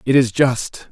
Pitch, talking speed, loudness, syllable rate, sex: 125 Hz, 195 wpm, -17 LUFS, 3.8 syllables/s, male